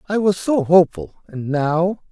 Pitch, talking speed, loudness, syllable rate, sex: 175 Hz, 140 wpm, -18 LUFS, 4.6 syllables/s, male